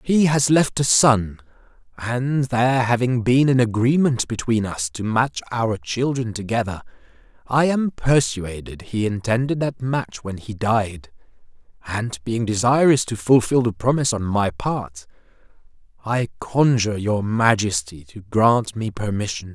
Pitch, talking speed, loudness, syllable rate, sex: 115 Hz, 140 wpm, -20 LUFS, 4.2 syllables/s, male